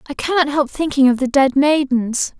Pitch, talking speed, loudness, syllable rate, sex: 275 Hz, 200 wpm, -16 LUFS, 4.9 syllables/s, female